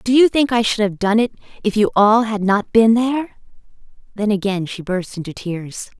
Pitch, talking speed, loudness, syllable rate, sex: 215 Hz, 210 wpm, -17 LUFS, 5.0 syllables/s, female